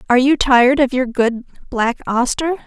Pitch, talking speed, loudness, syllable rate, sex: 255 Hz, 180 wpm, -16 LUFS, 5.3 syllables/s, female